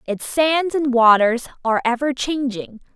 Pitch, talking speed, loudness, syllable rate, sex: 260 Hz, 140 wpm, -18 LUFS, 4.4 syllables/s, female